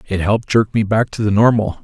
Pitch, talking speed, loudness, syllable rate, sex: 105 Hz, 260 wpm, -16 LUFS, 5.9 syllables/s, male